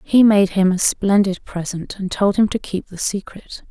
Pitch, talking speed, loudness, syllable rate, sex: 195 Hz, 210 wpm, -18 LUFS, 4.5 syllables/s, female